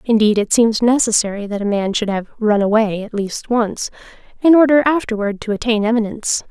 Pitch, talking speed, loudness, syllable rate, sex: 220 Hz, 185 wpm, -16 LUFS, 5.6 syllables/s, female